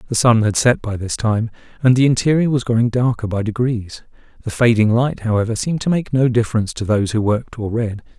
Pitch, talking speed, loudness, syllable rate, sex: 115 Hz, 220 wpm, -17 LUFS, 6.2 syllables/s, male